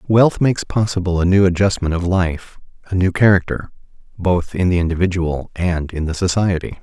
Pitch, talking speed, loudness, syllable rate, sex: 90 Hz, 165 wpm, -17 LUFS, 5.2 syllables/s, male